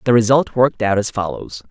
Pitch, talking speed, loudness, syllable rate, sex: 105 Hz, 210 wpm, -17 LUFS, 5.9 syllables/s, male